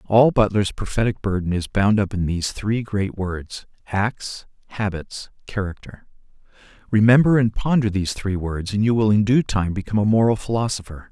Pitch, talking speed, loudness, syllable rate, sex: 105 Hz, 160 wpm, -21 LUFS, 5.1 syllables/s, male